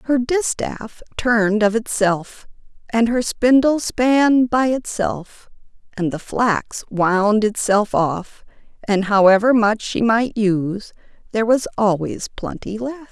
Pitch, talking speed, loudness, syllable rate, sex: 220 Hz, 130 wpm, -18 LUFS, 3.7 syllables/s, female